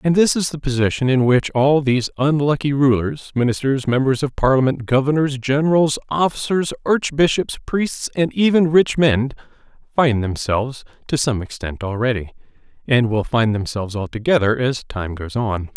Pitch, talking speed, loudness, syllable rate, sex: 130 Hz, 150 wpm, -18 LUFS, 5.0 syllables/s, male